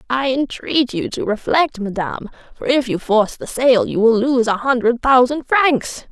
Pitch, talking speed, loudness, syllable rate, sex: 245 Hz, 185 wpm, -17 LUFS, 4.6 syllables/s, female